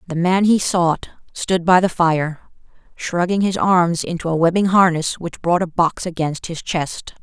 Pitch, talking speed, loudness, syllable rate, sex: 175 Hz, 185 wpm, -18 LUFS, 4.4 syllables/s, female